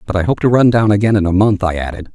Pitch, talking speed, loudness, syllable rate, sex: 100 Hz, 335 wpm, -13 LUFS, 7.1 syllables/s, male